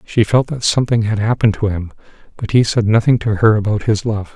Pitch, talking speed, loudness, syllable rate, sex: 110 Hz, 235 wpm, -15 LUFS, 6.0 syllables/s, male